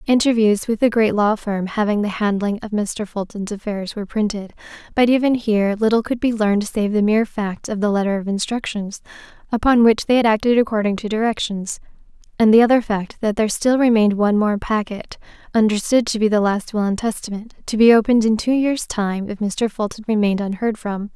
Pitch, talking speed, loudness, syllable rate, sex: 215 Hz, 195 wpm, -19 LUFS, 5.8 syllables/s, female